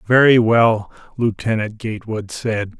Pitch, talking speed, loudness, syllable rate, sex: 110 Hz, 105 wpm, -18 LUFS, 4.2 syllables/s, male